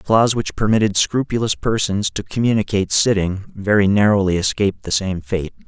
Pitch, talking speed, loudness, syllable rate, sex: 100 Hz, 160 wpm, -18 LUFS, 5.6 syllables/s, male